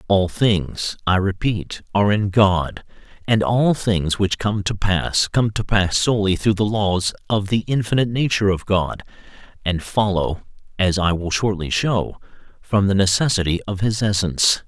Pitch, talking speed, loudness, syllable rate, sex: 100 Hz, 165 wpm, -19 LUFS, 4.3 syllables/s, male